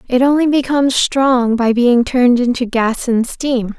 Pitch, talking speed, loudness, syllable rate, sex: 250 Hz, 175 wpm, -14 LUFS, 4.5 syllables/s, female